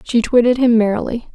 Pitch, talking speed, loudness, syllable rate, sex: 235 Hz, 180 wpm, -15 LUFS, 5.8 syllables/s, female